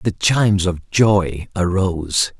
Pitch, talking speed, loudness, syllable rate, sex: 95 Hz, 125 wpm, -18 LUFS, 3.7 syllables/s, male